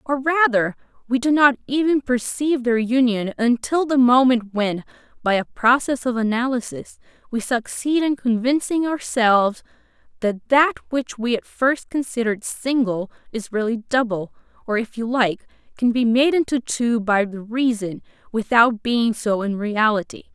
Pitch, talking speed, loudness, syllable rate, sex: 240 Hz, 150 wpm, -20 LUFS, 4.6 syllables/s, female